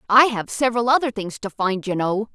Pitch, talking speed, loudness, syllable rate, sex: 220 Hz, 230 wpm, -21 LUFS, 5.6 syllables/s, female